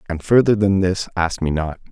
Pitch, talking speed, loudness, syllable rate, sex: 95 Hz, 220 wpm, -18 LUFS, 5.2 syllables/s, male